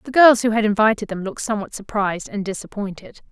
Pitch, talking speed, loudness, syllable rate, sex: 210 Hz, 200 wpm, -20 LUFS, 6.8 syllables/s, female